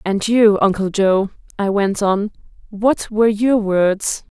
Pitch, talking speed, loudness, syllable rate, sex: 205 Hz, 150 wpm, -17 LUFS, 3.7 syllables/s, female